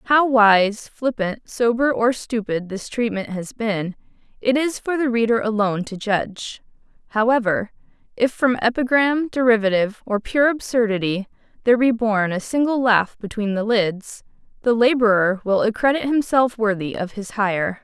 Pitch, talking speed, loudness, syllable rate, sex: 225 Hz, 150 wpm, -20 LUFS, 4.7 syllables/s, female